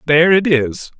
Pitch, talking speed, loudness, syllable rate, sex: 155 Hz, 180 wpm, -14 LUFS, 5.1 syllables/s, male